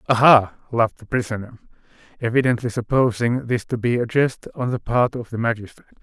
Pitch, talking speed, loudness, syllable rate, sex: 115 Hz, 180 wpm, -21 LUFS, 6.0 syllables/s, male